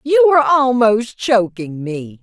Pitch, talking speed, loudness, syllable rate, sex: 225 Hz, 135 wpm, -15 LUFS, 3.8 syllables/s, female